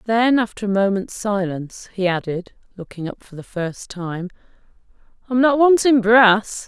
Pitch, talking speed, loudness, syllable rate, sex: 205 Hz, 155 wpm, -19 LUFS, 4.6 syllables/s, female